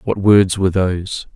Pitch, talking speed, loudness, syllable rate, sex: 95 Hz, 175 wpm, -15 LUFS, 5.0 syllables/s, male